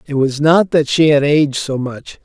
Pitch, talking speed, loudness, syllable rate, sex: 145 Hz, 240 wpm, -14 LUFS, 4.8 syllables/s, male